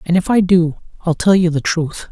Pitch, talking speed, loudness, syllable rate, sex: 175 Hz, 255 wpm, -15 LUFS, 5.1 syllables/s, male